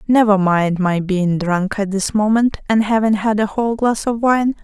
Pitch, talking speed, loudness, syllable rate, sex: 210 Hz, 205 wpm, -17 LUFS, 4.6 syllables/s, female